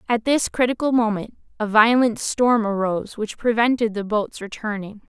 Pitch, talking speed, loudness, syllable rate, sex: 220 Hz, 150 wpm, -21 LUFS, 5.0 syllables/s, female